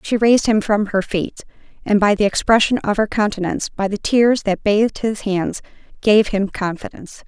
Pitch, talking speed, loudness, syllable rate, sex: 210 Hz, 190 wpm, -17 LUFS, 5.2 syllables/s, female